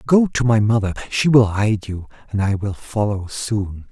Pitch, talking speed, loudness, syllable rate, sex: 110 Hz, 200 wpm, -19 LUFS, 4.6 syllables/s, male